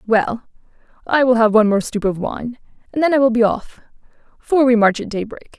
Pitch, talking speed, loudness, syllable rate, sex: 235 Hz, 215 wpm, -17 LUFS, 5.6 syllables/s, female